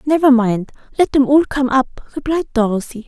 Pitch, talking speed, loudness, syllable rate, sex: 260 Hz, 175 wpm, -16 LUFS, 5.1 syllables/s, female